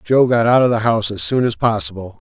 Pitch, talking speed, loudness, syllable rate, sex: 115 Hz, 265 wpm, -16 LUFS, 6.2 syllables/s, male